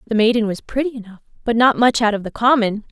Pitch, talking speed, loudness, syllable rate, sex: 225 Hz, 245 wpm, -17 LUFS, 6.6 syllables/s, female